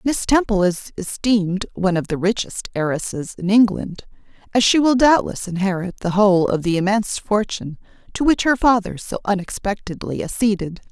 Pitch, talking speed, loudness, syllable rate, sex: 200 Hz, 160 wpm, -19 LUFS, 5.3 syllables/s, female